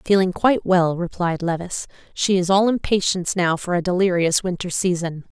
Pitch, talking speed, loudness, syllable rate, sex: 180 Hz, 165 wpm, -20 LUFS, 5.5 syllables/s, female